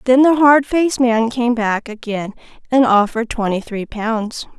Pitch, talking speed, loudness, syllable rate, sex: 235 Hz, 170 wpm, -16 LUFS, 4.5 syllables/s, female